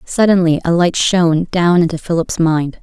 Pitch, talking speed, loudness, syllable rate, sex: 170 Hz, 170 wpm, -14 LUFS, 4.8 syllables/s, female